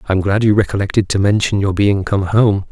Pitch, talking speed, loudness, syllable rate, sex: 100 Hz, 245 wpm, -15 LUFS, 6.0 syllables/s, male